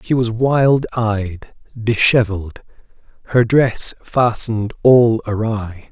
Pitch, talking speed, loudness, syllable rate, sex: 115 Hz, 100 wpm, -16 LUFS, 3.4 syllables/s, male